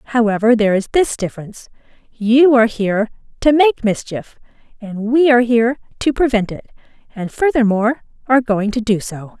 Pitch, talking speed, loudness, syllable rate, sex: 230 Hz, 160 wpm, -16 LUFS, 5.6 syllables/s, female